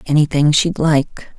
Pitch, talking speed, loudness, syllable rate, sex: 150 Hz, 130 wpm, -15 LUFS, 4.0 syllables/s, female